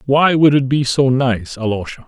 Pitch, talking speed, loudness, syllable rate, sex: 130 Hz, 200 wpm, -15 LUFS, 4.7 syllables/s, male